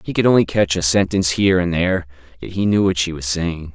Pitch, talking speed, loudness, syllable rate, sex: 90 Hz, 255 wpm, -17 LUFS, 6.3 syllables/s, male